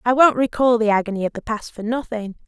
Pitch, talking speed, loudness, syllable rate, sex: 225 Hz, 240 wpm, -20 LUFS, 6.0 syllables/s, female